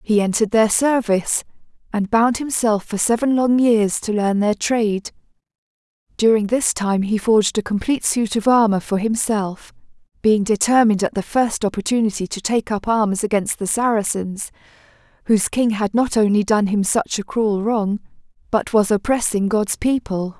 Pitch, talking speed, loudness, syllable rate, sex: 215 Hz, 165 wpm, -19 LUFS, 4.9 syllables/s, female